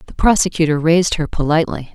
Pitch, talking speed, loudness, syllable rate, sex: 160 Hz, 155 wpm, -16 LUFS, 6.8 syllables/s, female